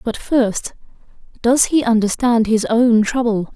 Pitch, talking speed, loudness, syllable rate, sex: 230 Hz, 135 wpm, -16 LUFS, 4.0 syllables/s, female